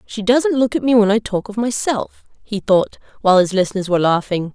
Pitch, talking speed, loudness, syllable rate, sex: 210 Hz, 225 wpm, -17 LUFS, 5.7 syllables/s, female